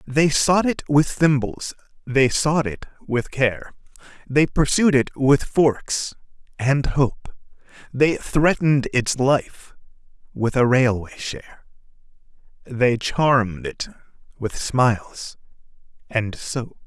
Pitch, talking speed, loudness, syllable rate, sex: 135 Hz, 115 wpm, -20 LUFS, 3.4 syllables/s, male